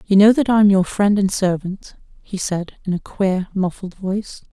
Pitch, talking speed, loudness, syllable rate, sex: 195 Hz, 210 wpm, -18 LUFS, 4.7 syllables/s, female